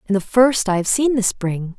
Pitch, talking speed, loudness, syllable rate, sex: 215 Hz, 270 wpm, -18 LUFS, 4.9 syllables/s, female